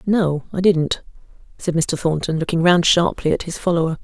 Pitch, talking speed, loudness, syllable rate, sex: 170 Hz, 180 wpm, -19 LUFS, 5.2 syllables/s, female